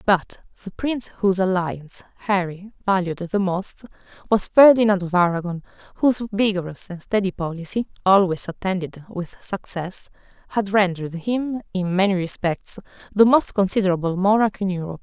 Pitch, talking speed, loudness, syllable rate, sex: 190 Hz, 135 wpm, -21 LUFS, 5.3 syllables/s, female